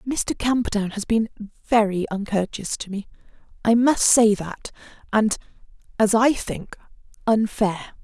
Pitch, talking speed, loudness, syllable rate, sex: 215 Hz, 120 wpm, -22 LUFS, 4.1 syllables/s, female